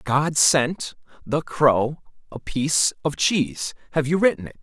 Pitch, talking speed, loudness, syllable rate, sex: 145 Hz, 155 wpm, -21 LUFS, 4.0 syllables/s, male